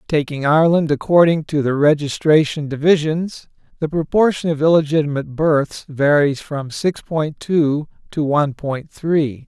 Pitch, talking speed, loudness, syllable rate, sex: 150 Hz, 135 wpm, -17 LUFS, 4.6 syllables/s, male